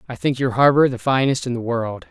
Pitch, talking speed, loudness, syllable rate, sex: 125 Hz, 255 wpm, -19 LUFS, 5.8 syllables/s, male